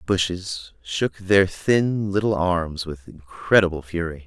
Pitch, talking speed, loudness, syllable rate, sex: 90 Hz, 140 wpm, -22 LUFS, 4.0 syllables/s, male